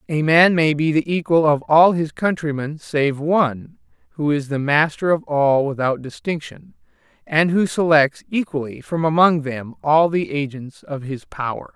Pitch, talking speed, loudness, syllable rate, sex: 155 Hz, 170 wpm, -19 LUFS, 4.5 syllables/s, male